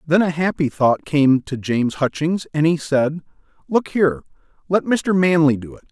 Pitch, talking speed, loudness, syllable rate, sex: 155 Hz, 185 wpm, -19 LUFS, 4.9 syllables/s, male